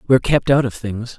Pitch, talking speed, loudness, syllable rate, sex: 125 Hz, 255 wpm, -18 LUFS, 5.8 syllables/s, male